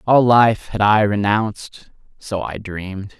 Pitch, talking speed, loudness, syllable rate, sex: 105 Hz, 150 wpm, -17 LUFS, 4.0 syllables/s, male